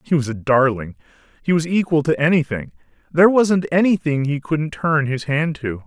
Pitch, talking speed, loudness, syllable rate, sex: 150 Hz, 185 wpm, -18 LUFS, 5.1 syllables/s, male